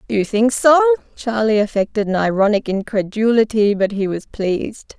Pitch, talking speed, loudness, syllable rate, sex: 220 Hz, 145 wpm, -17 LUFS, 4.9 syllables/s, female